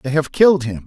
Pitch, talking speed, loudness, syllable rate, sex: 140 Hz, 275 wpm, -16 LUFS, 6.0 syllables/s, male